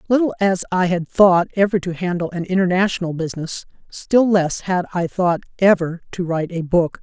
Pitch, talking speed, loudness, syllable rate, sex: 180 Hz, 180 wpm, -19 LUFS, 5.3 syllables/s, female